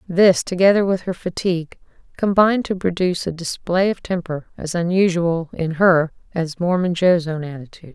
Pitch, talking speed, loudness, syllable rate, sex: 175 Hz, 160 wpm, -19 LUFS, 5.2 syllables/s, female